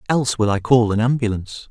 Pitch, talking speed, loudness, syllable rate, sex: 115 Hz, 210 wpm, -18 LUFS, 6.5 syllables/s, male